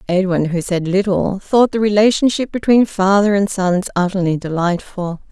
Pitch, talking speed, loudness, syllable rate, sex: 195 Hz, 145 wpm, -16 LUFS, 4.8 syllables/s, female